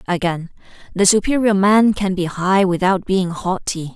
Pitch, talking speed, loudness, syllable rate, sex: 190 Hz, 150 wpm, -17 LUFS, 4.6 syllables/s, female